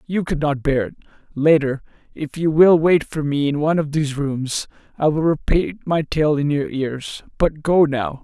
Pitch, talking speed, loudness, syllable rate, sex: 150 Hz, 205 wpm, -19 LUFS, 4.6 syllables/s, male